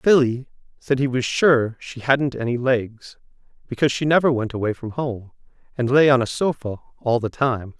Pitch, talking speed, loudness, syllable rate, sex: 130 Hz, 185 wpm, -21 LUFS, 4.8 syllables/s, male